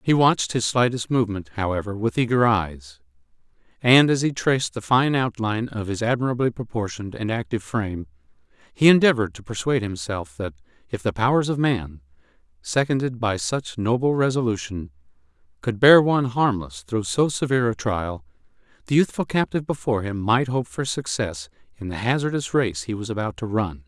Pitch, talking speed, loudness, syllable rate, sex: 110 Hz, 165 wpm, -22 LUFS, 5.6 syllables/s, male